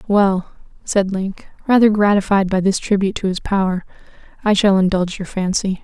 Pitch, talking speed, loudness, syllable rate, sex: 195 Hz, 165 wpm, -17 LUFS, 5.5 syllables/s, female